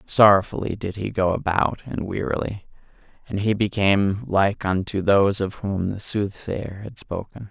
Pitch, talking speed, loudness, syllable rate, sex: 100 Hz, 150 wpm, -22 LUFS, 4.6 syllables/s, male